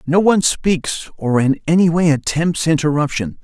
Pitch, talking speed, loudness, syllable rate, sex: 155 Hz, 155 wpm, -16 LUFS, 4.7 syllables/s, male